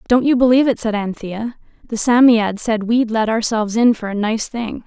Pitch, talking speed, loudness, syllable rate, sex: 225 Hz, 210 wpm, -17 LUFS, 5.2 syllables/s, female